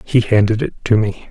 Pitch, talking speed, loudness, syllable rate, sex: 110 Hz, 230 wpm, -16 LUFS, 5.5 syllables/s, male